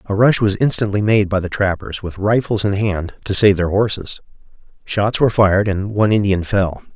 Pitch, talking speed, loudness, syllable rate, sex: 100 Hz, 200 wpm, -17 LUFS, 5.3 syllables/s, male